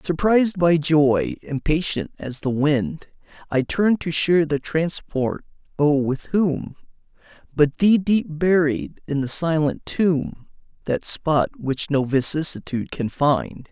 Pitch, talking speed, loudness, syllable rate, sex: 155 Hz, 125 wpm, -21 LUFS, 3.8 syllables/s, male